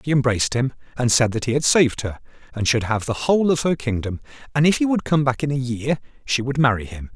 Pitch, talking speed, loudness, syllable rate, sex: 130 Hz, 260 wpm, -21 LUFS, 6.3 syllables/s, male